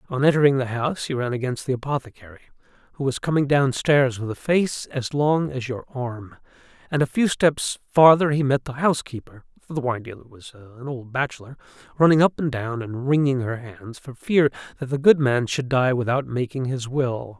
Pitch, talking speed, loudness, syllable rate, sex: 130 Hz, 195 wpm, -22 LUFS, 5.4 syllables/s, male